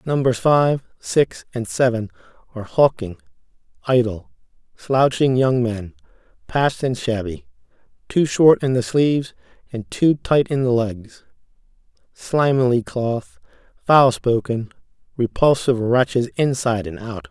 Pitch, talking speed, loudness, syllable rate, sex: 125 Hz, 120 wpm, -19 LUFS, 4.4 syllables/s, male